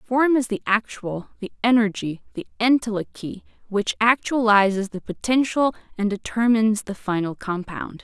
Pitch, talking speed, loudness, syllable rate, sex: 220 Hz, 125 wpm, -22 LUFS, 4.8 syllables/s, female